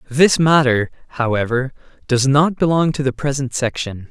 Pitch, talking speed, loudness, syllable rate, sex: 135 Hz, 145 wpm, -17 LUFS, 4.8 syllables/s, male